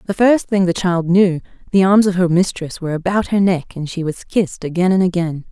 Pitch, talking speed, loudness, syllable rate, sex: 180 Hz, 240 wpm, -16 LUFS, 5.7 syllables/s, female